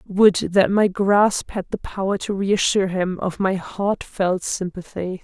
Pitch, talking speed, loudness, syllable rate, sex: 190 Hz, 160 wpm, -20 LUFS, 4.0 syllables/s, female